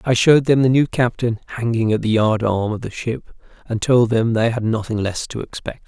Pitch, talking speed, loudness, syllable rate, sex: 115 Hz, 235 wpm, -18 LUFS, 5.3 syllables/s, male